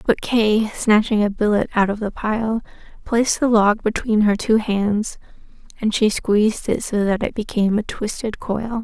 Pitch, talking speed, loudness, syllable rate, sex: 215 Hz, 185 wpm, -19 LUFS, 4.6 syllables/s, female